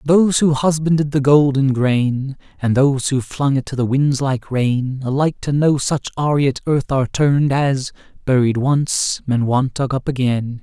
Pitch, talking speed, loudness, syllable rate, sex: 135 Hz, 185 wpm, -17 LUFS, 4.6 syllables/s, male